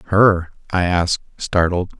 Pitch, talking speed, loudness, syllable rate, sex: 90 Hz, 120 wpm, -18 LUFS, 4.4 syllables/s, male